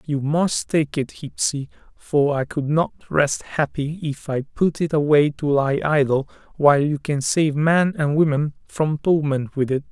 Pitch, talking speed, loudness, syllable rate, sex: 145 Hz, 180 wpm, -21 LUFS, 4.1 syllables/s, male